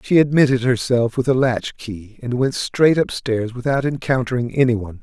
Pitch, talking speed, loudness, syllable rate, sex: 125 Hz, 165 wpm, -19 LUFS, 4.9 syllables/s, male